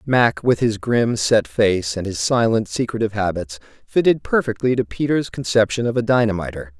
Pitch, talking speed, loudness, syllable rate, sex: 110 Hz, 170 wpm, -19 LUFS, 5.2 syllables/s, male